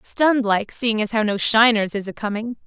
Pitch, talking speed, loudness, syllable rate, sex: 220 Hz, 205 wpm, -19 LUFS, 5.2 syllables/s, female